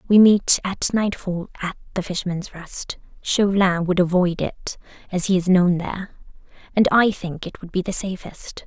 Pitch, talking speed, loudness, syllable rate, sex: 185 Hz, 175 wpm, -21 LUFS, 4.8 syllables/s, female